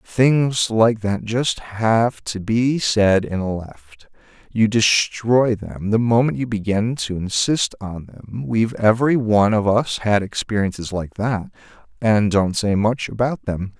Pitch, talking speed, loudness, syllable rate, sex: 110 Hz, 155 wpm, -19 LUFS, 3.8 syllables/s, male